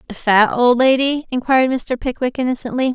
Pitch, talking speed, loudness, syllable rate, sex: 250 Hz, 165 wpm, -16 LUFS, 5.5 syllables/s, female